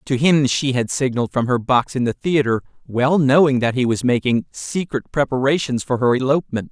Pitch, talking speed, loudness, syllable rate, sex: 130 Hz, 195 wpm, -19 LUFS, 5.4 syllables/s, male